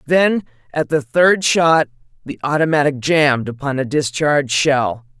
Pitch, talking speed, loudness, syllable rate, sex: 145 Hz, 140 wpm, -16 LUFS, 4.5 syllables/s, female